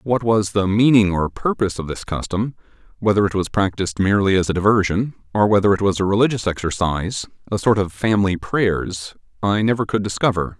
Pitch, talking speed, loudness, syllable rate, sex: 100 Hz, 185 wpm, -19 LUFS, 5.9 syllables/s, male